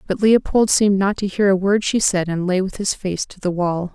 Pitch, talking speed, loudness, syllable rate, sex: 195 Hz, 275 wpm, -18 LUFS, 5.3 syllables/s, female